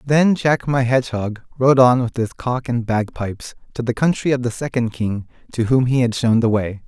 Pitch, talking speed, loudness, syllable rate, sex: 125 Hz, 220 wpm, -19 LUFS, 5.0 syllables/s, male